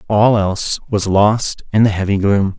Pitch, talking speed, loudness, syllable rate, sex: 100 Hz, 185 wpm, -15 LUFS, 4.4 syllables/s, male